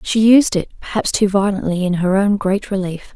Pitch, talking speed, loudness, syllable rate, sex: 195 Hz, 210 wpm, -16 LUFS, 5.1 syllables/s, female